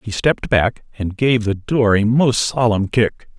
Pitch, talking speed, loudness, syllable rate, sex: 115 Hz, 195 wpm, -17 LUFS, 4.2 syllables/s, male